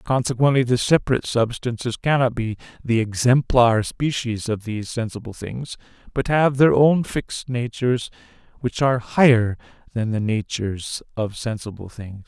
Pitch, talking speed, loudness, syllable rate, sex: 120 Hz, 135 wpm, -21 LUFS, 4.9 syllables/s, male